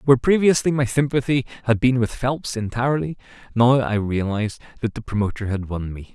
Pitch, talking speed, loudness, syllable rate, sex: 120 Hz, 175 wpm, -21 LUFS, 5.8 syllables/s, male